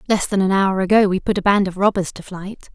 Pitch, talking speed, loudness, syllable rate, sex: 195 Hz, 285 wpm, -18 LUFS, 6.0 syllables/s, female